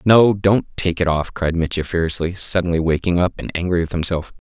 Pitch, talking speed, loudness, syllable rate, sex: 85 Hz, 200 wpm, -18 LUFS, 5.5 syllables/s, male